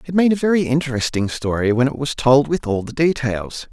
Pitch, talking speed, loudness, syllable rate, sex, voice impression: 135 Hz, 225 wpm, -19 LUFS, 5.6 syllables/s, male, masculine, adult-like, slightly fluent, intellectual, slightly refreshing, friendly